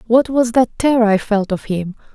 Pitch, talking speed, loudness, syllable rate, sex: 225 Hz, 225 wpm, -16 LUFS, 5.1 syllables/s, female